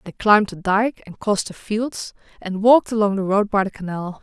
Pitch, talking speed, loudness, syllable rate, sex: 205 Hz, 225 wpm, -20 LUFS, 5.7 syllables/s, female